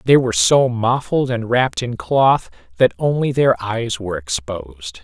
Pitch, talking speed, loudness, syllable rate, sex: 110 Hz, 165 wpm, -17 LUFS, 4.6 syllables/s, male